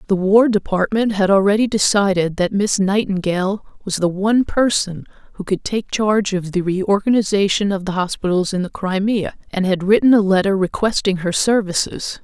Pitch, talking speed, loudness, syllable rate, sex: 195 Hz, 165 wpm, -17 LUFS, 5.2 syllables/s, female